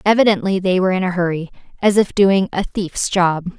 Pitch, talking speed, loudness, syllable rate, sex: 185 Hz, 200 wpm, -17 LUFS, 5.4 syllables/s, female